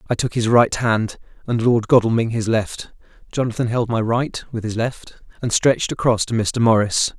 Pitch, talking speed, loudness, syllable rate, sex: 115 Hz, 190 wpm, -19 LUFS, 5.0 syllables/s, male